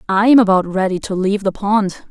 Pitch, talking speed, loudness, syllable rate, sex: 200 Hz, 200 wpm, -15 LUFS, 5.2 syllables/s, female